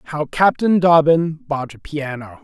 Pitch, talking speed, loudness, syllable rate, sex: 150 Hz, 150 wpm, -17 LUFS, 3.8 syllables/s, male